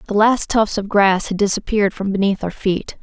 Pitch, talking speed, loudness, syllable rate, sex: 200 Hz, 220 wpm, -18 LUFS, 5.3 syllables/s, female